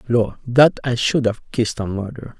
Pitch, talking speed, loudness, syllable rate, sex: 120 Hz, 200 wpm, -19 LUFS, 5.6 syllables/s, male